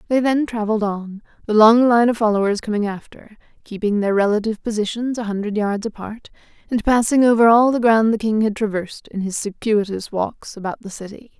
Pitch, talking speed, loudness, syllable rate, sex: 215 Hz, 190 wpm, -18 LUFS, 5.7 syllables/s, female